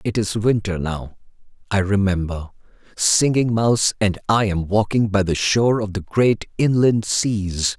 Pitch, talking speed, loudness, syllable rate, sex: 105 Hz, 155 wpm, -19 LUFS, 4.3 syllables/s, male